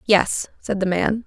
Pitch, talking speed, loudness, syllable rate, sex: 200 Hz, 190 wpm, -21 LUFS, 3.9 syllables/s, female